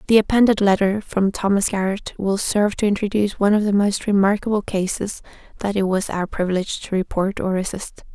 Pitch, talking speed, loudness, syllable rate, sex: 200 Hz, 185 wpm, -20 LUFS, 5.9 syllables/s, female